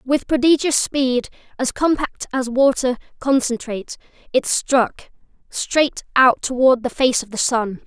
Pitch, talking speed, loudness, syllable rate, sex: 255 Hz, 130 wpm, -19 LUFS, 4.1 syllables/s, female